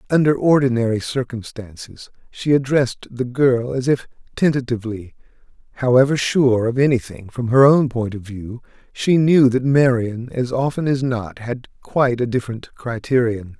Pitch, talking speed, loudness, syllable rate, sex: 125 Hz, 145 wpm, -18 LUFS, 4.8 syllables/s, male